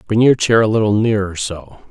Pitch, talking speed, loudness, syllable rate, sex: 105 Hz, 190 wpm, -15 LUFS, 5.4 syllables/s, male